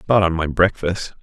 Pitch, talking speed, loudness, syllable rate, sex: 90 Hz, 195 wpm, -19 LUFS, 5.1 syllables/s, male